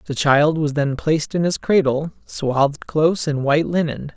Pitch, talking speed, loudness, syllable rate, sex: 150 Hz, 190 wpm, -19 LUFS, 4.9 syllables/s, male